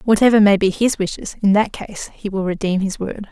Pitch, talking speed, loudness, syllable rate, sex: 200 Hz, 235 wpm, -17 LUFS, 5.5 syllables/s, female